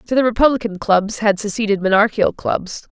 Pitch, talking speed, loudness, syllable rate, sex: 210 Hz, 160 wpm, -17 LUFS, 5.7 syllables/s, female